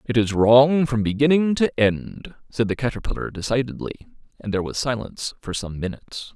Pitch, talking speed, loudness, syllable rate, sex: 120 Hz, 170 wpm, -21 LUFS, 5.5 syllables/s, male